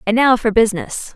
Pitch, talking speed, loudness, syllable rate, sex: 225 Hz, 210 wpm, -15 LUFS, 5.8 syllables/s, female